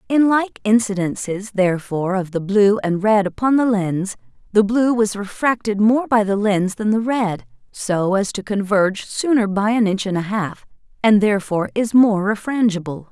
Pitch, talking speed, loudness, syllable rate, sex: 205 Hz, 180 wpm, -18 LUFS, 4.8 syllables/s, female